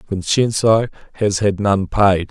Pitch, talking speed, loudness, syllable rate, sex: 100 Hz, 130 wpm, -17 LUFS, 3.9 syllables/s, male